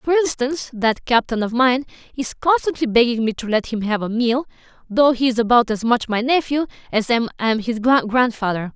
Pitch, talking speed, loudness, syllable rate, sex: 240 Hz, 190 wpm, -19 LUFS, 5.1 syllables/s, female